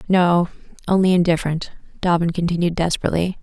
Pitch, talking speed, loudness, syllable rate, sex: 175 Hz, 105 wpm, -19 LUFS, 6.4 syllables/s, female